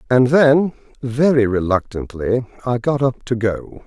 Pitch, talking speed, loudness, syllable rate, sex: 125 Hz, 140 wpm, -17 LUFS, 4.0 syllables/s, male